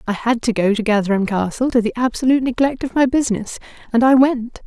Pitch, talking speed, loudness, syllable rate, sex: 235 Hz, 220 wpm, -17 LUFS, 6.3 syllables/s, female